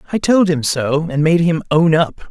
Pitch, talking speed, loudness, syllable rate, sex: 160 Hz, 235 wpm, -15 LUFS, 4.7 syllables/s, male